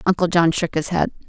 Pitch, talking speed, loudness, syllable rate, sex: 170 Hz, 235 wpm, -19 LUFS, 5.8 syllables/s, female